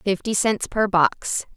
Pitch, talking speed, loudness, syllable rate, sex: 200 Hz, 155 wpm, -21 LUFS, 3.5 syllables/s, female